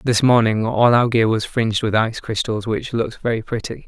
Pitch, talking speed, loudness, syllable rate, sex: 115 Hz, 215 wpm, -19 LUFS, 5.6 syllables/s, male